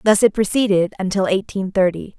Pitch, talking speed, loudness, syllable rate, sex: 195 Hz, 165 wpm, -18 LUFS, 5.5 syllables/s, female